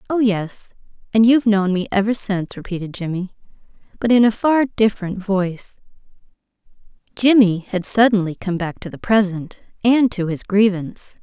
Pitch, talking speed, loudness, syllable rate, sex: 205 Hz, 140 wpm, -18 LUFS, 5.1 syllables/s, female